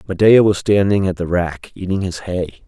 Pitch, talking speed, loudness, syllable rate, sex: 95 Hz, 200 wpm, -16 LUFS, 5.2 syllables/s, male